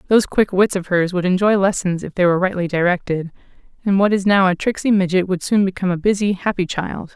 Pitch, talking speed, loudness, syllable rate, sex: 190 Hz, 225 wpm, -18 LUFS, 6.2 syllables/s, female